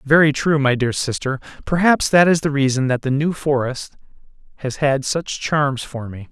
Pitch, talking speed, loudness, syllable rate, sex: 140 Hz, 190 wpm, -19 LUFS, 4.7 syllables/s, male